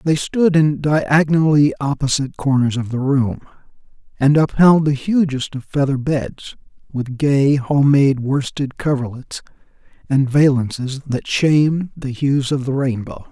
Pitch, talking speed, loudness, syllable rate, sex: 140 Hz, 135 wpm, -17 LUFS, 4.3 syllables/s, male